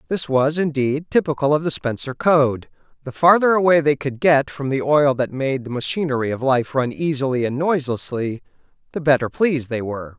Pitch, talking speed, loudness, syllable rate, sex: 140 Hz, 185 wpm, -19 LUFS, 5.4 syllables/s, male